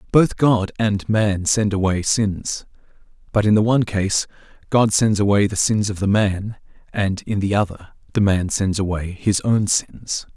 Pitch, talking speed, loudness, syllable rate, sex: 100 Hz, 180 wpm, -19 LUFS, 4.3 syllables/s, male